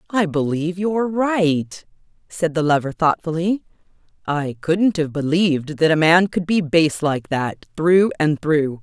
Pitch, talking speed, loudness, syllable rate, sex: 165 Hz, 155 wpm, -19 LUFS, 4.2 syllables/s, female